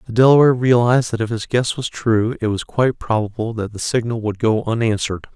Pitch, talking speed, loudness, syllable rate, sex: 115 Hz, 215 wpm, -18 LUFS, 6.0 syllables/s, male